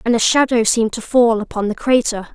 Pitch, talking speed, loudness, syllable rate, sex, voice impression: 230 Hz, 230 wpm, -16 LUFS, 5.8 syllables/s, female, slightly gender-neutral, young, slightly tensed, slightly cute, friendly, slightly lively